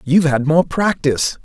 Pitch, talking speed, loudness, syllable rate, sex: 155 Hz, 165 wpm, -16 LUFS, 5.3 syllables/s, male